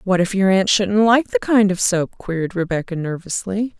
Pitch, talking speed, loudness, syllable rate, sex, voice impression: 195 Hz, 205 wpm, -18 LUFS, 5.0 syllables/s, female, very feminine, slightly middle-aged, thin, slightly tensed, slightly powerful, bright, soft, very clear, very fluent, cute, very intellectual, refreshing, very sincere, calm, very friendly, very reassuring, very elegant, sweet, very lively, kind, slightly intense, light